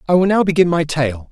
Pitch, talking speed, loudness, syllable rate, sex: 165 Hz, 275 wpm, -16 LUFS, 6.3 syllables/s, male